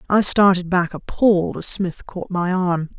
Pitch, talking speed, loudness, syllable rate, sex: 185 Hz, 180 wpm, -19 LUFS, 4.4 syllables/s, female